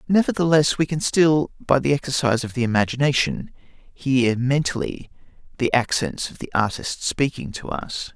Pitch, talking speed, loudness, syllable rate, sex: 135 Hz, 145 wpm, -21 LUFS, 4.8 syllables/s, male